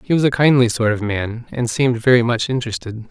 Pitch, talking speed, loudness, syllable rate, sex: 120 Hz, 230 wpm, -17 LUFS, 6.1 syllables/s, male